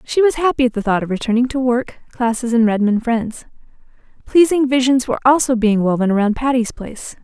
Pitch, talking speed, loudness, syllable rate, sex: 240 Hz, 190 wpm, -16 LUFS, 5.9 syllables/s, female